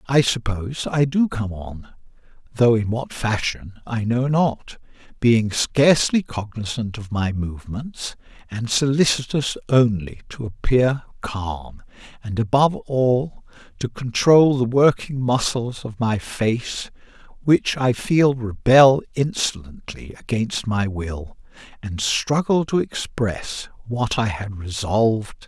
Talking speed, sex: 125 wpm, male